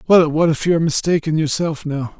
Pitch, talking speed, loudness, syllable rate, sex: 155 Hz, 220 wpm, -17 LUFS, 5.9 syllables/s, male